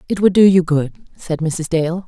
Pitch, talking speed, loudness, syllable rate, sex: 170 Hz, 230 wpm, -16 LUFS, 4.8 syllables/s, female